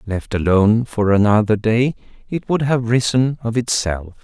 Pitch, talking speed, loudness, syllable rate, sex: 115 Hz, 155 wpm, -17 LUFS, 4.7 syllables/s, male